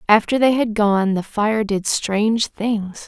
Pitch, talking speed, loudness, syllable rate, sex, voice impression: 215 Hz, 175 wpm, -19 LUFS, 3.8 syllables/s, female, feminine, slightly young, tensed, powerful, bright, slightly soft, slightly raspy, intellectual, friendly, lively, slightly intense